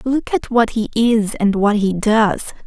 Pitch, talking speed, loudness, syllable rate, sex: 220 Hz, 200 wpm, -17 LUFS, 3.8 syllables/s, female